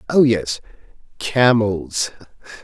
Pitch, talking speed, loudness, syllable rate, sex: 110 Hz, 70 wpm, -19 LUFS, 2.9 syllables/s, male